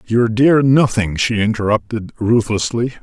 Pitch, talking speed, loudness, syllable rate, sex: 115 Hz, 120 wpm, -15 LUFS, 4.4 syllables/s, male